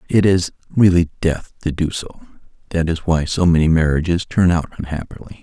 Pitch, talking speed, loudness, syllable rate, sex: 85 Hz, 165 wpm, -18 LUFS, 5.5 syllables/s, male